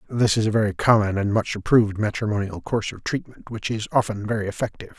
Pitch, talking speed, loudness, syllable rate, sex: 105 Hz, 205 wpm, -23 LUFS, 6.6 syllables/s, male